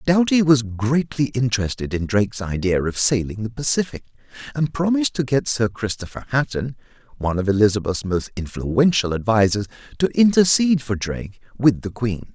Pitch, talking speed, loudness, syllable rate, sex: 120 Hz, 150 wpm, -20 LUFS, 5.4 syllables/s, male